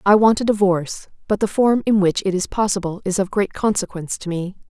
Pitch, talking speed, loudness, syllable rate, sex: 195 Hz, 230 wpm, -19 LUFS, 5.9 syllables/s, female